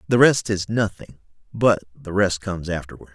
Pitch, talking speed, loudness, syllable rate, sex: 100 Hz, 170 wpm, -21 LUFS, 5.3 syllables/s, male